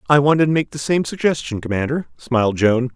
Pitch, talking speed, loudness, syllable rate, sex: 135 Hz, 205 wpm, -18 LUFS, 6.0 syllables/s, male